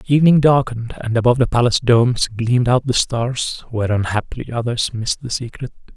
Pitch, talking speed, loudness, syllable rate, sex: 120 Hz, 180 wpm, -17 LUFS, 6.0 syllables/s, male